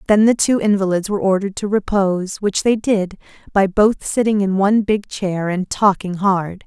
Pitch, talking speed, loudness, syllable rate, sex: 200 Hz, 190 wpm, -17 LUFS, 5.1 syllables/s, female